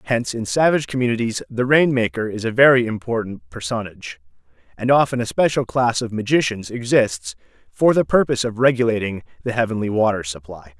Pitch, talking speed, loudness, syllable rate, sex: 115 Hz, 160 wpm, -19 LUFS, 5.9 syllables/s, male